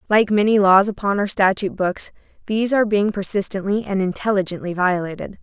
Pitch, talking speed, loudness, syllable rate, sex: 200 Hz, 155 wpm, -19 LUFS, 6.0 syllables/s, female